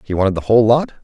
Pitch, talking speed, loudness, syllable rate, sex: 110 Hz, 290 wpm, -15 LUFS, 8.5 syllables/s, male